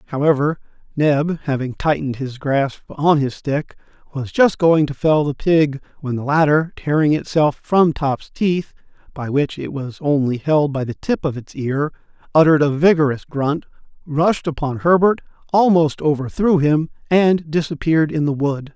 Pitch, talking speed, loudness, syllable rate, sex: 150 Hz, 165 wpm, -18 LUFS, 4.6 syllables/s, male